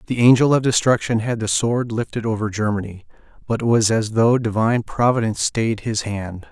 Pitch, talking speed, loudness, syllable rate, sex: 110 Hz, 185 wpm, -19 LUFS, 5.4 syllables/s, male